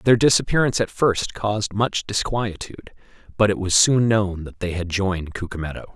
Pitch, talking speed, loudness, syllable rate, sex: 100 Hz, 170 wpm, -21 LUFS, 5.5 syllables/s, male